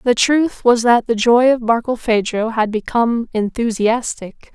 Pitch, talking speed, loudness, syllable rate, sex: 230 Hz, 145 wpm, -16 LUFS, 4.3 syllables/s, female